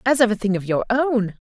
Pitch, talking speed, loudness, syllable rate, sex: 225 Hz, 285 wpm, -20 LUFS, 5.6 syllables/s, female